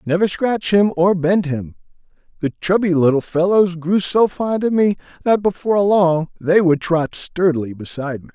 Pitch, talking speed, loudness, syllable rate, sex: 175 Hz, 175 wpm, -17 LUFS, 4.8 syllables/s, male